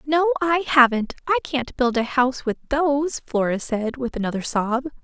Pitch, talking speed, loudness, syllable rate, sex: 270 Hz, 180 wpm, -21 LUFS, 4.8 syllables/s, female